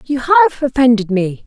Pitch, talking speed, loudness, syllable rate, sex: 245 Hz, 165 wpm, -13 LUFS, 5.8 syllables/s, female